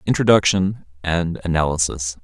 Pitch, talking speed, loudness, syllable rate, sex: 85 Hz, 80 wpm, -19 LUFS, 4.8 syllables/s, male